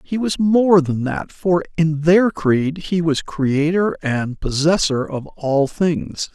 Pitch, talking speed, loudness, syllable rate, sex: 160 Hz, 160 wpm, -18 LUFS, 3.3 syllables/s, male